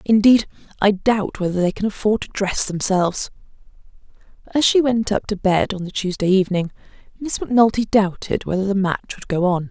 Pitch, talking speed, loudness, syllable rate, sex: 200 Hz, 180 wpm, -19 LUFS, 5.3 syllables/s, female